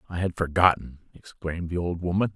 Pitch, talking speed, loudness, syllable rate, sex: 85 Hz, 180 wpm, -26 LUFS, 6.0 syllables/s, male